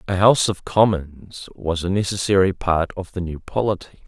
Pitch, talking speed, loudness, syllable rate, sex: 95 Hz, 175 wpm, -20 LUFS, 5.3 syllables/s, male